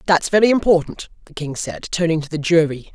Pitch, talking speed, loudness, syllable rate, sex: 170 Hz, 205 wpm, -18 LUFS, 5.8 syllables/s, male